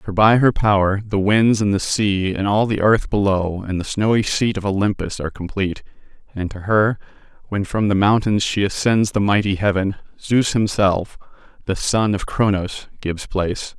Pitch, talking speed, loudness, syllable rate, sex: 100 Hz, 185 wpm, -19 LUFS, 4.9 syllables/s, male